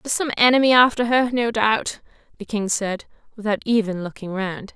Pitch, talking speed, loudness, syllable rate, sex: 220 Hz, 175 wpm, -20 LUFS, 5.3 syllables/s, female